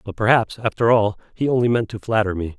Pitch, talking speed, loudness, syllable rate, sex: 110 Hz, 230 wpm, -20 LUFS, 6.2 syllables/s, male